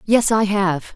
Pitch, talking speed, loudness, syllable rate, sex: 200 Hz, 190 wpm, -18 LUFS, 3.3 syllables/s, female